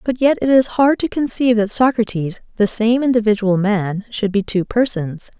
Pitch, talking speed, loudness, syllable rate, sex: 220 Hz, 190 wpm, -17 LUFS, 5.0 syllables/s, female